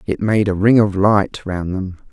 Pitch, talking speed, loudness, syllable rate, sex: 100 Hz, 225 wpm, -16 LUFS, 4.2 syllables/s, male